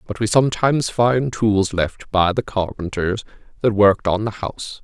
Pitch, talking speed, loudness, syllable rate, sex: 105 Hz, 175 wpm, -19 LUFS, 4.9 syllables/s, male